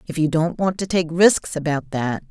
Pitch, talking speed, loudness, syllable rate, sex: 165 Hz, 235 wpm, -20 LUFS, 4.8 syllables/s, female